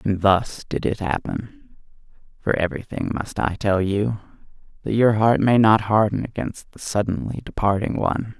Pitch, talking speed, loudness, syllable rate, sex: 105 Hz, 150 wpm, -21 LUFS, 4.8 syllables/s, male